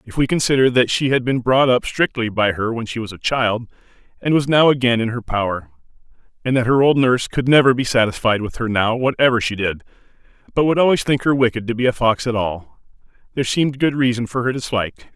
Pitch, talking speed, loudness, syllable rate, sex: 120 Hz, 230 wpm, -18 LUFS, 6.1 syllables/s, male